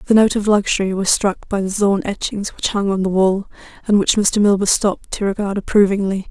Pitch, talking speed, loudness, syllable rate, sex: 200 Hz, 220 wpm, -17 LUFS, 5.5 syllables/s, female